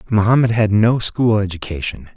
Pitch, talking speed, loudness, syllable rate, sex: 105 Hz, 140 wpm, -16 LUFS, 5.1 syllables/s, male